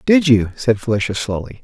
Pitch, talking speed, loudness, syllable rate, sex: 120 Hz, 185 wpm, -17 LUFS, 5.3 syllables/s, male